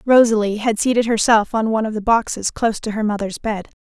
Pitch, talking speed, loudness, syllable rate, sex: 220 Hz, 220 wpm, -18 LUFS, 6.0 syllables/s, female